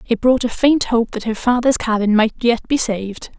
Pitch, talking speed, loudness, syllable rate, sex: 230 Hz, 230 wpm, -17 LUFS, 5.2 syllables/s, female